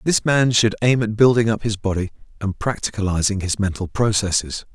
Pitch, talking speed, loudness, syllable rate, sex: 105 Hz, 175 wpm, -19 LUFS, 5.5 syllables/s, male